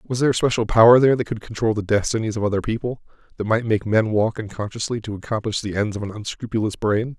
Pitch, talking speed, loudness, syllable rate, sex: 110 Hz, 235 wpm, -21 LUFS, 6.7 syllables/s, male